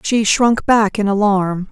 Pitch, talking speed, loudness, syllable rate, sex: 205 Hz, 175 wpm, -15 LUFS, 3.7 syllables/s, female